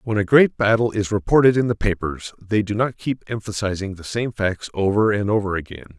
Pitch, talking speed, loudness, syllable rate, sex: 105 Hz, 210 wpm, -20 LUFS, 5.6 syllables/s, male